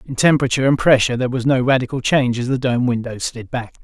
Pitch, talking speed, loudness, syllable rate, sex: 125 Hz, 235 wpm, -17 LUFS, 7.1 syllables/s, male